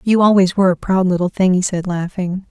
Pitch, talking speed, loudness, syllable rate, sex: 185 Hz, 240 wpm, -16 LUFS, 5.9 syllables/s, female